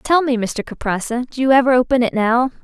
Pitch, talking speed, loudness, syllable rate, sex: 250 Hz, 230 wpm, -17 LUFS, 5.6 syllables/s, female